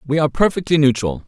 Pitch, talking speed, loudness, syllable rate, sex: 145 Hz, 190 wpm, -17 LUFS, 7.3 syllables/s, male